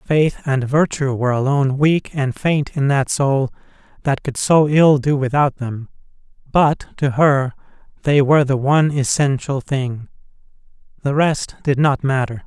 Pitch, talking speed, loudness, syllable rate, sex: 140 Hz, 155 wpm, -17 LUFS, 4.3 syllables/s, male